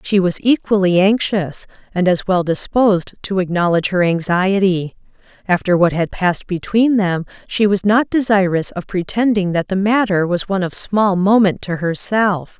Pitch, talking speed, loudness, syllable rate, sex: 190 Hz, 160 wpm, -16 LUFS, 4.8 syllables/s, female